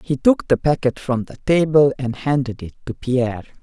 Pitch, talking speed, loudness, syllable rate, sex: 135 Hz, 200 wpm, -19 LUFS, 5.0 syllables/s, female